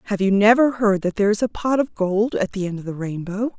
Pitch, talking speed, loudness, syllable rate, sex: 205 Hz, 285 wpm, -20 LUFS, 6.0 syllables/s, female